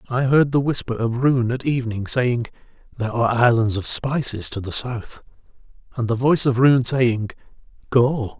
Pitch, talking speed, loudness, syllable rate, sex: 120 Hz, 170 wpm, -20 LUFS, 5.1 syllables/s, male